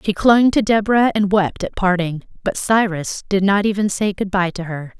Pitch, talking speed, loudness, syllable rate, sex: 195 Hz, 205 wpm, -18 LUFS, 5.0 syllables/s, female